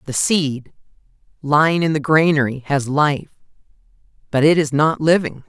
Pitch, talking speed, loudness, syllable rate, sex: 150 Hz, 140 wpm, -17 LUFS, 4.7 syllables/s, female